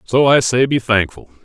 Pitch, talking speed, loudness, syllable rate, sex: 115 Hz, 210 wpm, -14 LUFS, 5.0 syllables/s, male